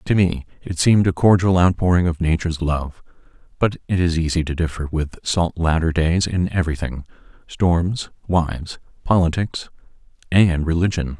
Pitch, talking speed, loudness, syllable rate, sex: 85 Hz, 140 wpm, -19 LUFS, 5.0 syllables/s, male